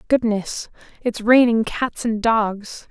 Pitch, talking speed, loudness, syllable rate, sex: 225 Hz, 125 wpm, -19 LUFS, 3.3 syllables/s, female